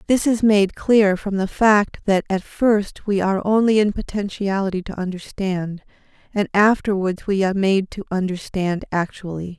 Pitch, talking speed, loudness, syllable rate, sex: 195 Hz, 155 wpm, -20 LUFS, 4.6 syllables/s, female